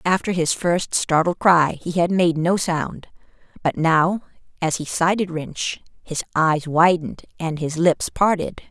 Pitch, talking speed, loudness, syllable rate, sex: 170 Hz, 160 wpm, -20 LUFS, 4.0 syllables/s, female